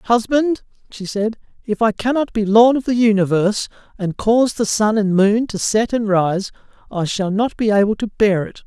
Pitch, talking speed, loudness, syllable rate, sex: 215 Hz, 200 wpm, -17 LUFS, 4.9 syllables/s, male